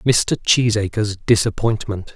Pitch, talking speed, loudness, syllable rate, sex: 105 Hz, 85 wpm, -18 LUFS, 3.8 syllables/s, male